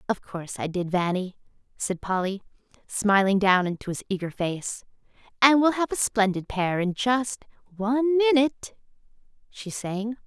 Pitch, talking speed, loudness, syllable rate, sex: 210 Hz, 135 wpm, -25 LUFS, 4.7 syllables/s, female